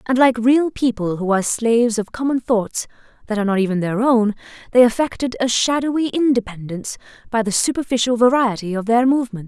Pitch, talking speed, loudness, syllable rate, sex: 235 Hz, 175 wpm, -18 LUFS, 5.9 syllables/s, female